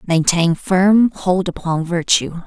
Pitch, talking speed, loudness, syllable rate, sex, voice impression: 180 Hz, 120 wpm, -16 LUFS, 3.5 syllables/s, female, very feminine, slightly young, very adult-like, slightly thin, relaxed, weak, bright, hard, slightly muffled, fluent, raspy, very cute, slightly cool, very intellectual, refreshing, sincere, very calm, friendly, very reassuring, very unique, elegant, wild, sweet, slightly lively, strict, slightly intense, modest, light